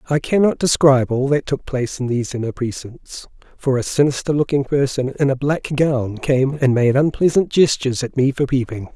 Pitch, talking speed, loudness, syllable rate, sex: 135 Hz, 195 wpm, -18 LUFS, 5.4 syllables/s, male